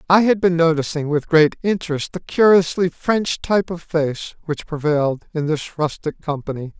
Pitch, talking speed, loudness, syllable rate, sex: 165 Hz, 170 wpm, -19 LUFS, 5.0 syllables/s, male